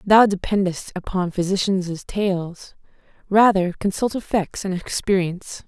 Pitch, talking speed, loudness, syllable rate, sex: 190 Hz, 105 wpm, -21 LUFS, 4.3 syllables/s, female